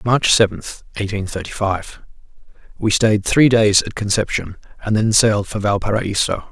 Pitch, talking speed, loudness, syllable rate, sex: 105 Hz, 140 wpm, -17 LUFS, 4.8 syllables/s, male